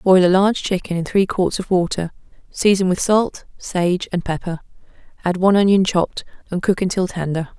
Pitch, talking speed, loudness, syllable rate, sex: 185 Hz, 180 wpm, -18 LUFS, 5.4 syllables/s, female